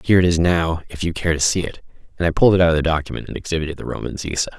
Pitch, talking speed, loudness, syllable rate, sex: 85 Hz, 260 wpm, -19 LUFS, 7.5 syllables/s, male